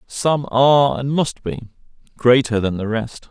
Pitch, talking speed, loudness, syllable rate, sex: 125 Hz, 165 wpm, -18 LUFS, 4.3 syllables/s, male